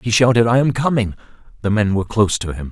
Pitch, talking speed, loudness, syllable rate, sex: 110 Hz, 245 wpm, -17 LUFS, 6.9 syllables/s, male